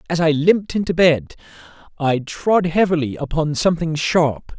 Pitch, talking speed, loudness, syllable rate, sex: 160 Hz, 145 wpm, -18 LUFS, 4.9 syllables/s, male